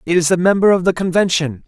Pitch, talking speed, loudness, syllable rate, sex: 175 Hz, 250 wpm, -15 LUFS, 6.5 syllables/s, male